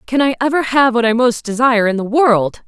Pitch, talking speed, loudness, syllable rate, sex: 240 Hz, 245 wpm, -14 LUFS, 5.6 syllables/s, female